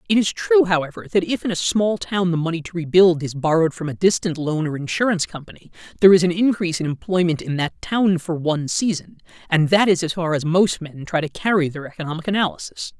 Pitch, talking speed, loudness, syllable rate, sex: 170 Hz, 225 wpm, -20 LUFS, 6.2 syllables/s, male